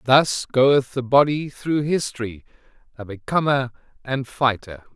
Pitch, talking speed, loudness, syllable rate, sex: 130 Hz, 120 wpm, -21 LUFS, 4.1 syllables/s, male